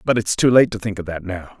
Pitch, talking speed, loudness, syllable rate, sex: 100 Hz, 340 wpm, -18 LUFS, 6.0 syllables/s, male